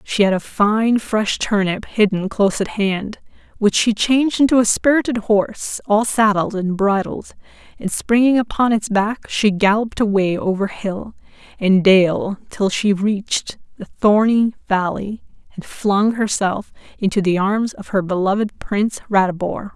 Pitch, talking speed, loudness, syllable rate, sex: 210 Hz, 150 wpm, -18 LUFS, 4.4 syllables/s, female